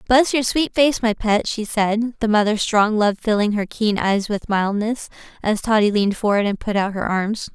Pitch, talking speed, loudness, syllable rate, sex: 215 Hz, 215 wpm, -19 LUFS, 4.8 syllables/s, female